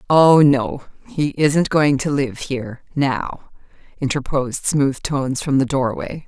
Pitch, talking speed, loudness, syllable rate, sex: 140 Hz, 135 wpm, -18 LUFS, 4.0 syllables/s, female